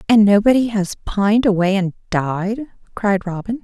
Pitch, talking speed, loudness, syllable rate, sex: 205 Hz, 150 wpm, -17 LUFS, 4.8 syllables/s, female